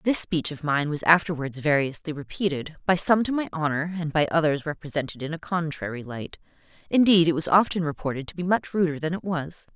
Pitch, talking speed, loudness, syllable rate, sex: 160 Hz, 205 wpm, -24 LUFS, 5.7 syllables/s, female